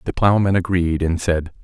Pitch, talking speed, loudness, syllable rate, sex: 85 Hz, 185 wpm, -19 LUFS, 4.9 syllables/s, male